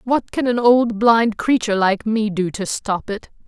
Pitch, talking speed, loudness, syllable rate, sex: 220 Hz, 205 wpm, -18 LUFS, 4.3 syllables/s, female